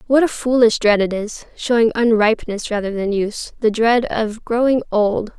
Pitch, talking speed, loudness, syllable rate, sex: 220 Hz, 155 wpm, -17 LUFS, 4.7 syllables/s, female